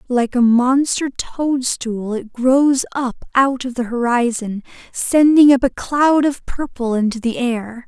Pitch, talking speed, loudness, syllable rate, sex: 255 Hz, 150 wpm, -17 LUFS, 3.8 syllables/s, female